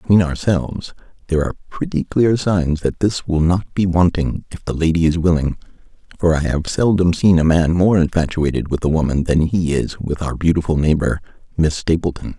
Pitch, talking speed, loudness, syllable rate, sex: 85 Hz, 190 wpm, -18 LUFS, 5.4 syllables/s, male